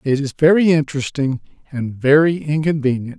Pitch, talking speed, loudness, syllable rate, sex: 145 Hz, 130 wpm, -17 LUFS, 5.4 syllables/s, male